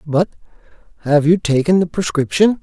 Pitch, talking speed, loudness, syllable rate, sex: 165 Hz, 135 wpm, -16 LUFS, 5.2 syllables/s, male